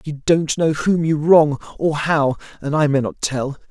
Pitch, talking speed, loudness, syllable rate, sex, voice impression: 150 Hz, 210 wpm, -18 LUFS, 4.2 syllables/s, male, masculine, slightly young, adult-like, slightly thick, tensed, slightly powerful, very bright, hard, clear, fluent, cool, slightly intellectual, very refreshing, sincere, slightly calm, friendly, reassuring, unique, slightly elegant, wild, slightly sweet, lively, kind, slightly intense, slightly light